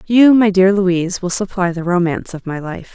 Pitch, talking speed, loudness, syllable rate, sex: 190 Hz, 225 wpm, -15 LUFS, 5.3 syllables/s, female